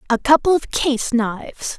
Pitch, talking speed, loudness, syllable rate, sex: 260 Hz, 170 wpm, -18 LUFS, 4.4 syllables/s, female